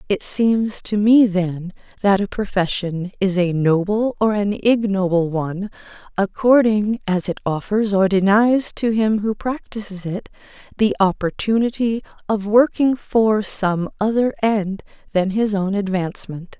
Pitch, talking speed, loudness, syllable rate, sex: 205 Hz, 135 wpm, -19 LUFS, 4.2 syllables/s, female